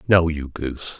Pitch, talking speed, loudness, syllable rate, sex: 75 Hz, 180 wpm, -22 LUFS, 4.8 syllables/s, male